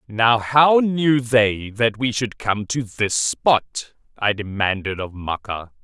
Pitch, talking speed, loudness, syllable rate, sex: 115 Hz, 155 wpm, -20 LUFS, 3.3 syllables/s, male